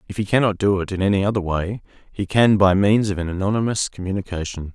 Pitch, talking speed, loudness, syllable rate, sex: 100 Hz, 215 wpm, -20 LUFS, 6.3 syllables/s, male